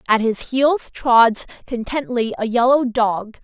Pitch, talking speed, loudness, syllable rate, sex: 240 Hz, 140 wpm, -18 LUFS, 4.0 syllables/s, female